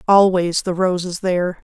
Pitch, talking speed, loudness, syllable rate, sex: 180 Hz, 175 wpm, -18 LUFS, 4.7 syllables/s, female